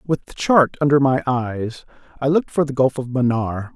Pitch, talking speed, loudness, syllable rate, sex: 135 Hz, 210 wpm, -19 LUFS, 5.0 syllables/s, male